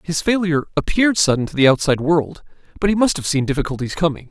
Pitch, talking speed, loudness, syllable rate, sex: 160 Hz, 210 wpm, -18 LUFS, 7.0 syllables/s, male